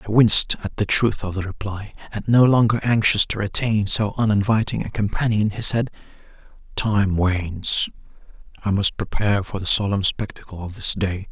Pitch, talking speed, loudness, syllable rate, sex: 105 Hz, 170 wpm, -20 LUFS, 5.2 syllables/s, male